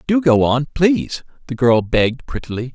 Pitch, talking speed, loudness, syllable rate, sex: 135 Hz, 155 wpm, -17 LUFS, 5.2 syllables/s, male